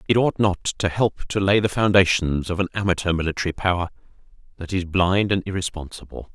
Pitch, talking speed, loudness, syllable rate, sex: 90 Hz, 180 wpm, -21 LUFS, 5.8 syllables/s, male